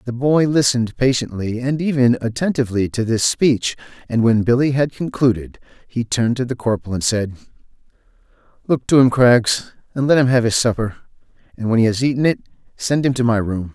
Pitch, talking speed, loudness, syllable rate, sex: 120 Hz, 190 wpm, -18 LUFS, 5.8 syllables/s, male